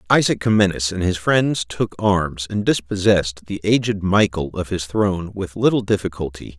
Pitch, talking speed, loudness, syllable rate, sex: 95 Hz, 165 wpm, -20 LUFS, 5.0 syllables/s, male